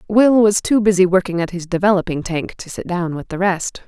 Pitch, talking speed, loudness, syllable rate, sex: 185 Hz, 230 wpm, -17 LUFS, 5.4 syllables/s, female